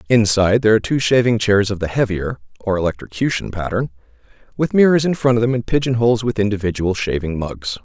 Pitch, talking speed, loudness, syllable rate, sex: 110 Hz, 190 wpm, -18 LUFS, 6.4 syllables/s, male